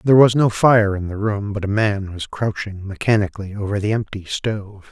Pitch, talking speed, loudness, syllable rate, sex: 105 Hz, 210 wpm, -19 LUFS, 5.4 syllables/s, male